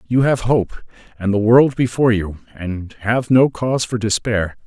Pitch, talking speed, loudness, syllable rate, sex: 115 Hz, 180 wpm, -17 LUFS, 4.6 syllables/s, male